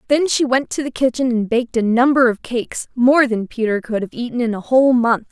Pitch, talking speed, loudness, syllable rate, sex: 245 Hz, 250 wpm, -17 LUFS, 5.8 syllables/s, female